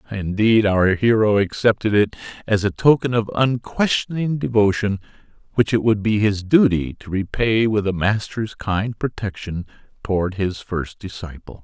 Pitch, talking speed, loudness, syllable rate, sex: 105 Hz, 145 wpm, -20 LUFS, 4.6 syllables/s, male